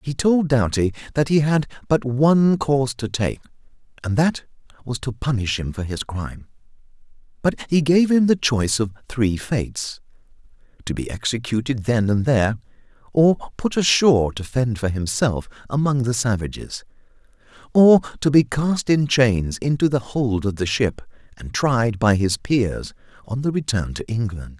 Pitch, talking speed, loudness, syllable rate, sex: 125 Hz, 160 wpm, -20 LUFS, 4.7 syllables/s, male